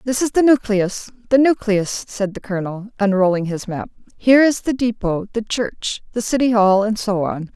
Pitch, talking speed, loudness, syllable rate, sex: 215 Hz, 190 wpm, -18 LUFS, 4.9 syllables/s, female